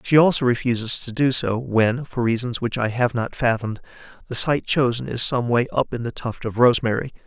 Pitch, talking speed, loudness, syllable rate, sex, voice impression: 120 Hz, 215 wpm, -21 LUFS, 5.5 syllables/s, male, very masculine, adult-like, thick, slightly tensed, slightly weak, bright, slightly soft, muffled, fluent, slightly raspy, cool, slightly intellectual, refreshing, sincere, calm, slightly mature, slightly friendly, slightly reassuring, slightly unique, slightly elegant, slightly wild, slightly sweet, lively, kind, modest